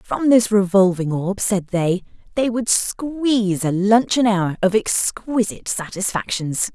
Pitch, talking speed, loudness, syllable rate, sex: 205 Hz, 135 wpm, -19 LUFS, 3.9 syllables/s, female